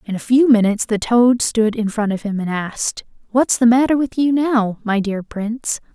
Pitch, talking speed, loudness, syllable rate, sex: 225 Hz, 220 wpm, -17 LUFS, 5.0 syllables/s, female